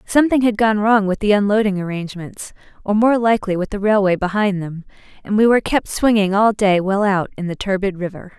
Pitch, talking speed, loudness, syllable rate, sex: 205 Hz, 210 wpm, -17 LUFS, 5.9 syllables/s, female